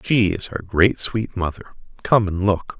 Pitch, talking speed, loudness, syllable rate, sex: 100 Hz, 195 wpm, -20 LUFS, 4.6 syllables/s, male